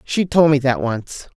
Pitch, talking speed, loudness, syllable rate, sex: 145 Hz, 215 wpm, -17 LUFS, 4.1 syllables/s, female